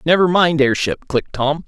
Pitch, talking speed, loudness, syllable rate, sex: 150 Hz, 180 wpm, -16 LUFS, 5.5 syllables/s, male